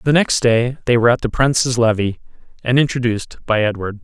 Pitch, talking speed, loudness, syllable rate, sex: 120 Hz, 195 wpm, -17 LUFS, 6.0 syllables/s, male